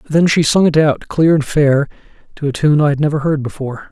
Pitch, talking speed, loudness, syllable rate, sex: 150 Hz, 245 wpm, -14 LUFS, 5.7 syllables/s, male